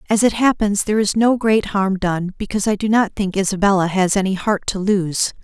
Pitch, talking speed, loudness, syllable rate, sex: 200 Hz, 220 wpm, -18 LUFS, 5.5 syllables/s, female